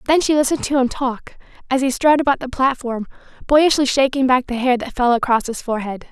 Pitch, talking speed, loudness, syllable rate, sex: 260 Hz, 215 wpm, -18 LUFS, 6.2 syllables/s, female